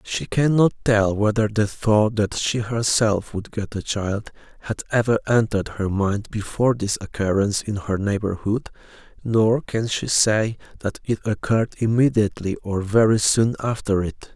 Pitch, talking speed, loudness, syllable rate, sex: 110 Hz, 155 wpm, -21 LUFS, 4.6 syllables/s, male